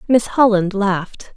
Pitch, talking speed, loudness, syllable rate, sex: 210 Hz, 130 wpm, -16 LUFS, 4.3 syllables/s, female